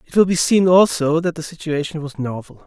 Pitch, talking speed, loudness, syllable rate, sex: 160 Hz, 225 wpm, -18 LUFS, 5.5 syllables/s, male